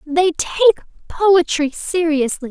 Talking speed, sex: 95 wpm, female